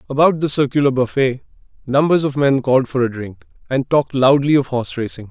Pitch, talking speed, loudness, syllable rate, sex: 135 Hz, 180 wpm, -17 LUFS, 5.8 syllables/s, male